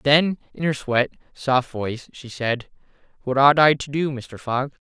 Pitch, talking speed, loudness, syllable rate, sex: 135 Hz, 185 wpm, -21 LUFS, 4.3 syllables/s, male